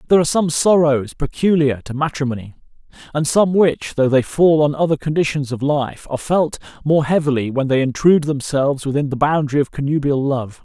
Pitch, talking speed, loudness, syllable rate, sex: 145 Hz, 180 wpm, -17 LUFS, 5.8 syllables/s, male